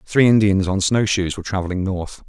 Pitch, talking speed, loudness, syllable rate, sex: 100 Hz, 210 wpm, -19 LUFS, 5.6 syllables/s, male